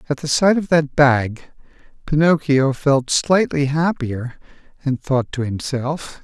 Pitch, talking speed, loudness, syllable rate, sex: 145 Hz, 135 wpm, -18 LUFS, 3.8 syllables/s, male